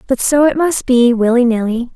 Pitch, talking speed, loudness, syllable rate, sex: 250 Hz, 215 wpm, -13 LUFS, 5.1 syllables/s, female